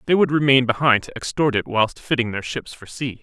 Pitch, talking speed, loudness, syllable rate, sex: 125 Hz, 240 wpm, -20 LUFS, 5.6 syllables/s, male